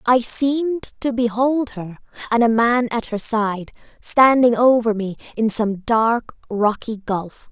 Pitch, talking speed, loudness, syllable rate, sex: 230 Hz, 150 wpm, -19 LUFS, 3.8 syllables/s, female